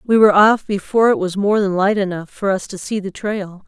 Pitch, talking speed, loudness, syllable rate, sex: 200 Hz, 260 wpm, -17 LUFS, 5.6 syllables/s, female